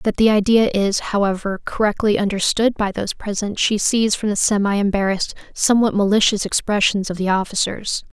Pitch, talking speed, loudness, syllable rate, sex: 205 Hz, 160 wpm, -18 LUFS, 5.5 syllables/s, female